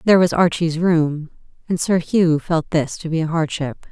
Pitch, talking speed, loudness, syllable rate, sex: 165 Hz, 215 wpm, -19 LUFS, 5.2 syllables/s, female